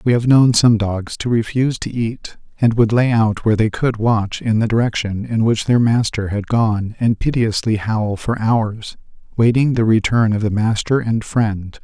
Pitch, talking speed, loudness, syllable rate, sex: 115 Hz, 200 wpm, -17 LUFS, 4.5 syllables/s, male